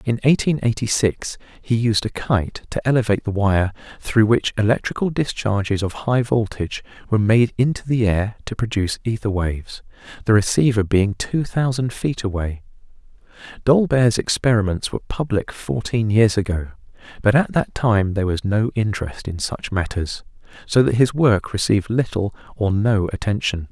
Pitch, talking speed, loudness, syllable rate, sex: 110 Hz, 155 wpm, -20 LUFS, 5.1 syllables/s, male